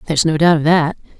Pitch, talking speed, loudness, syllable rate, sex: 160 Hz, 300 wpm, -14 LUFS, 8.5 syllables/s, female